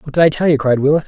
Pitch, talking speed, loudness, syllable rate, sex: 145 Hz, 390 wpm, -14 LUFS, 7.8 syllables/s, male